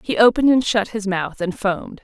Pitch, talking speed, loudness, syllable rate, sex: 210 Hz, 235 wpm, -19 LUFS, 5.7 syllables/s, female